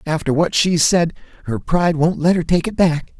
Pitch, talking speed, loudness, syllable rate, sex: 160 Hz, 225 wpm, -17 LUFS, 5.2 syllables/s, male